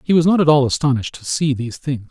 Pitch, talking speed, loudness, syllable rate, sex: 135 Hz, 285 wpm, -17 LUFS, 7.1 syllables/s, male